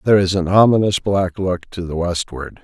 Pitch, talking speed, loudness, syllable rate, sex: 95 Hz, 205 wpm, -17 LUFS, 5.2 syllables/s, male